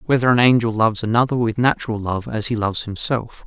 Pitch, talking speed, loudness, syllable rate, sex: 115 Hz, 210 wpm, -19 LUFS, 6.3 syllables/s, male